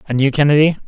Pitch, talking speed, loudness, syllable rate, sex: 145 Hz, 205 wpm, -14 LUFS, 7.7 syllables/s, male